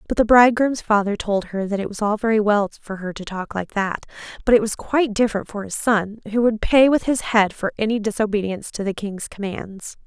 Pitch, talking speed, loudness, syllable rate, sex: 210 Hz, 235 wpm, -20 LUFS, 5.7 syllables/s, female